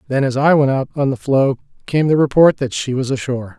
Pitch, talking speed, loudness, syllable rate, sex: 135 Hz, 250 wpm, -16 LUFS, 5.9 syllables/s, male